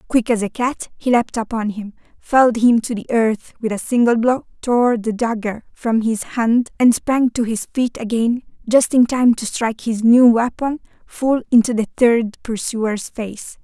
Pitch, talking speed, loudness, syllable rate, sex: 230 Hz, 190 wpm, -18 LUFS, 4.3 syllables/s, female